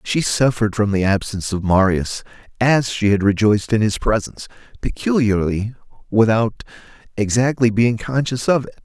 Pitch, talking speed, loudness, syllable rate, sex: 110 Hz, 145 wpm, -18 LUFS, 5.2 syllables/s, male